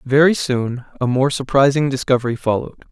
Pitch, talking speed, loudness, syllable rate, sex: 135 Hz, 145 wpm, -18 LUFS, 5.9 syllables/s, male